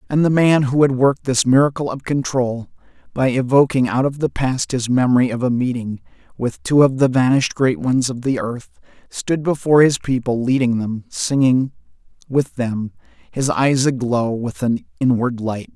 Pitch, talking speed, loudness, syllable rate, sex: 130 Hz, 180 wpm, -18 LUFS, 4.9 syllables/s, male